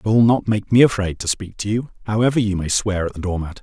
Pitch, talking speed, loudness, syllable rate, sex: 105 Hz, 280 wpm, -19 LUFS, 6.0 syllables/s, male